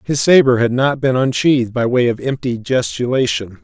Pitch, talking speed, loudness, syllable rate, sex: 125 Hz, 180 wpm, -15 LUFS, 5.4 syllables/s, male